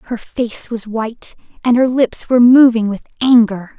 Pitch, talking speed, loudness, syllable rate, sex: 235 Hz, 175 wpm, -14 LUFS, 4.6 syllables/s, female